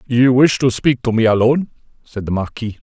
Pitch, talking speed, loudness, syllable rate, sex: 120 Hz, 210 wpm, -15 LUFS, 5.6 syllables/s, male